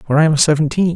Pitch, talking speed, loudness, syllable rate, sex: 155 Hz, 250 wpm, -14 LUFS, 7.1 syllables/s, male